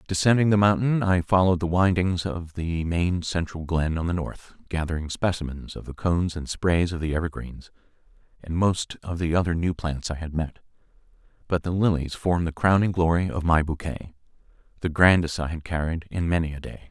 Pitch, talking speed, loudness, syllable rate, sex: 85 Hz, 190 wpm, -24 LUFS, 5.4 syllables/s, male